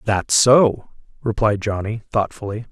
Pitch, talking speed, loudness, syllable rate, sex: 110 Hz, 110 wpm, -18 LUFS, 4.1 syllables/s, male